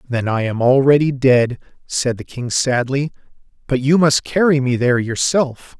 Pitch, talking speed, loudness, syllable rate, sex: 130 Hz, 165 wpm, -17 LUFS, 4.6 syllables/s, male